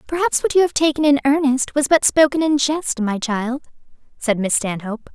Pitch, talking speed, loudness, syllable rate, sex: 275 Hz, 200 wpm, -18 LUFS, 5.3 syllables/s, female